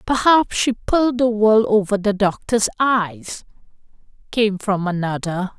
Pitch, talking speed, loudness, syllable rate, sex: 210 Hz, 130 wpm, -18 LUFS, 4.0 syllables/s, female